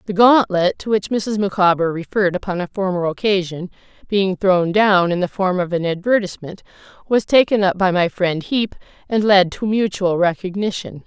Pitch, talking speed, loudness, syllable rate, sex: 190 Hz, 180 wpm, -18 LUFS, 5.2 syllables/s, female